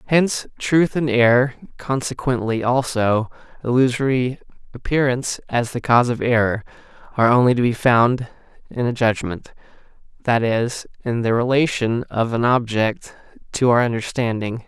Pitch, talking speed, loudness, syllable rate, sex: 120 Hz, 130 wpm, -19 LUFS, 4.9 syllables/s, male